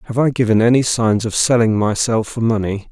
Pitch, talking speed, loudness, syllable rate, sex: 115 Hz, 205 wpm, -16 LUFS, 5.5 syllables/s, male